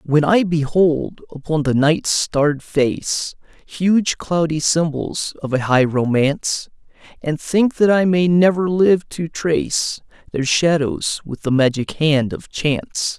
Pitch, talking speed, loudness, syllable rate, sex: 155 Hz, 145 wpm, -18 LUFS, 3.6 syllables/s, male